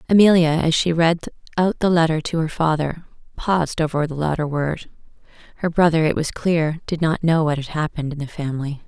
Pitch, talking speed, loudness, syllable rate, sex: 160 Hz, 195 wpm, -20 LUFS, 5.7 syllables/s, female